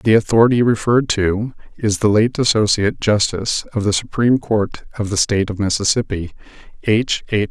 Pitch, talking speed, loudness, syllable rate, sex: 110 Hz, 160 wpm, -17 LUFS, 5.7 syllables/s, male